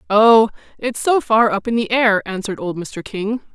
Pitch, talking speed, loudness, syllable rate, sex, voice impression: 220 Hz, 205 wpm, -17 LUFS, 4.7 syllables/s, female, feminine, very adult-like, intellectual, slightly strict